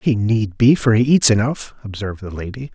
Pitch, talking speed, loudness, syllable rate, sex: 110 Hz, 220 wpm, -17 LUFS, 5.5 syllables/s, male